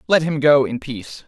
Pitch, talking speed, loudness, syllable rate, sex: 140 Hz, 235 wpm, -17 LUFS, 5.4 syllables/s, male